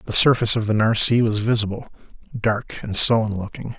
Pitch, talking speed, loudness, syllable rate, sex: 110 Hz, 175 wpm, -19 LUFS, 5.9 syllables/s, male